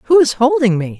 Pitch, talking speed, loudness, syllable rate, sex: 245 Hz, 240 wpm, -14 LUFS, 6.2 syllables/s, female